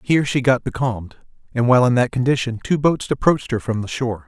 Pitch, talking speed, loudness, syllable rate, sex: 125 Hz, 225 wpm, -19 LUFS, 6.6 syllables/s, male